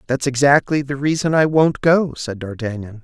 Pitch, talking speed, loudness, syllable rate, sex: 140 Hz, 180 wpm, -18 LUFS, 4.9 syllables/s, male